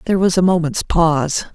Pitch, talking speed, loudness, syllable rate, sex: 175 Hz, 195 wpm, -16 LUFS, 6.1 syllables/s, female